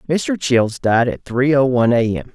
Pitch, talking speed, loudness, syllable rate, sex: 130 Hz, 230 wpm, -17 LUFS, 4.6 syllables/s, male